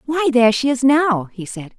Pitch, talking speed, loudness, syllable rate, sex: 250 Hz, 235 wpm, -16 LUFS, 4.9 syllables/s, female